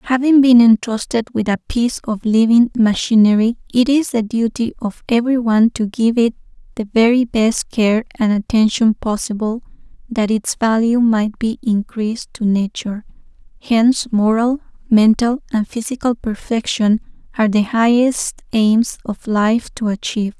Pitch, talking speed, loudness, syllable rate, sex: 225 Hz, 140 wpm, -16 LUFS, 4.6 syllables/s, female